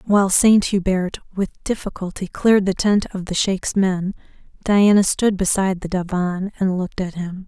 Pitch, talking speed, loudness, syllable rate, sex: 190 Hz, 170 wpm, -19 LUFS, 4.8 syllables/s, female